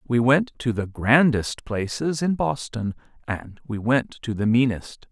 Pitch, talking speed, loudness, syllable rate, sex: 120 Hz, 165 wpm, -23 LUFS, 4.0 syllables/s, male